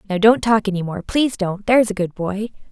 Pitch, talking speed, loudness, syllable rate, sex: 205 Hz, 220 wpm, -19 LUFS, 6.1 syllables/s, female